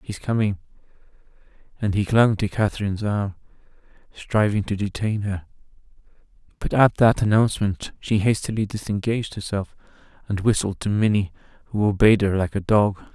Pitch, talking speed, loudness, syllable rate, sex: 105 Hz, 135 wpm, -22 LUFS, 5.4 syllables/s, male